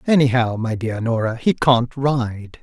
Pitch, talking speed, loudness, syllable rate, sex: 120 Hz, 160 wpm, -19 LUFS, 4.1 syllables/s, male